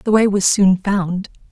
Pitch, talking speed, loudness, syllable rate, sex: 195 Hz, 200 wpm, -16 LUFS, 4.1 syllables/s, female